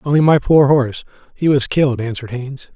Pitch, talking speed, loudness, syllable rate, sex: 135 Hz, 195 wpm, -15 LUFS, 6.4 syllables/s, male